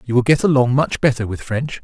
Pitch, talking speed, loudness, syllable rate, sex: 130 Hz, 260 wpm, -17 LUFS, 5.8 syllables/s, male